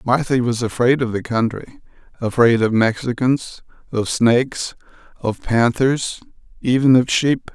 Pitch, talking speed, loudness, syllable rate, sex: 120 Hz, 120 wpm, -18 LUFS, 4.3 syllables/s, male